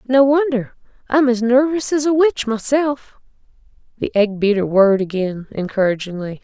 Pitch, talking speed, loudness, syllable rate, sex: 235 Hz, 130 wpm, -17 LUFS, 5.0 syllables/s, female